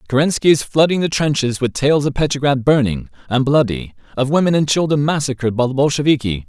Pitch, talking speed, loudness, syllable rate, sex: 140 Hz, 185 wpm, -16 LUFS, 5.9 syllables/s, male